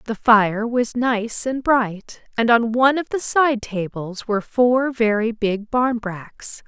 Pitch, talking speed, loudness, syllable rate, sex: 230 Hz, 160 wpm, -19 LUFS, 3.7 syllables/s, female